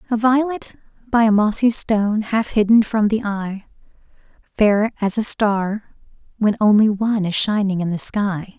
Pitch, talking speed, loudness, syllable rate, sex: 210 Hz, 160 wpm, -18 LUFS, 4.6 syllables/s, female